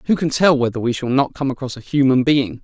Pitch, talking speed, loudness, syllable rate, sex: 135 Hz, 275 wpm, -18 LUFS, 6.1 syllables/s, male